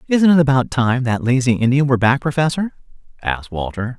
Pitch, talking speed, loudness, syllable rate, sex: 130 Hz, 180 wpm, -17 LUFS, 6.0 syllables/s, male